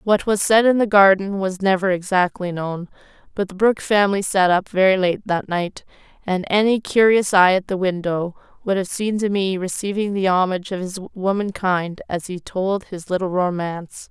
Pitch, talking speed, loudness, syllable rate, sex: 190 Hz, 185 wpm, -19 LUFS, 5.0 syllables/s, female